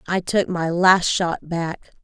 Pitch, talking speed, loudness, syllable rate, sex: 175 Hz, 175 wpm, -20 LUFS, 3.4 syllables/s, female